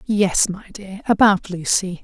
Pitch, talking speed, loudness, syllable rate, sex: 195 Hz, 120 wpm, -18 LUFS, 3.9 syllables/s, female